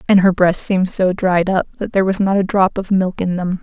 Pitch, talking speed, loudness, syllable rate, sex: 185 Hz, 280 wpm, -16 LUFS, 5.7 syllables/s, female